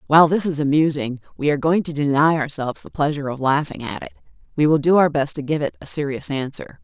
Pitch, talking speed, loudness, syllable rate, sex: 150 Hz, 235 wpm, -20 LUFS, 6.5 syllables/s, female